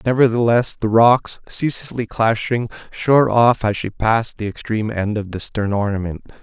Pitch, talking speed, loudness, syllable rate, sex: 110 Hz, 160 wpm, -18 LUFS, 5.2 syllables/s, male